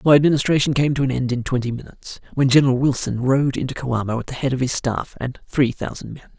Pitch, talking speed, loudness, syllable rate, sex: 130 Hz, 235 wpm, -20 LUFS, 6.4 syllables/s, male